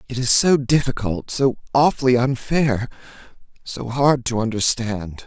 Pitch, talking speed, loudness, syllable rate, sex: 125 Hz, 100 wpm, -19 LUFS, 4.3 syllables/s, male